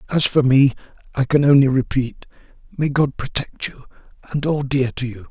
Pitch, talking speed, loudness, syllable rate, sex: 135 Hz, 180 wpm, -19 LUFS, 5.3 syllables/s, male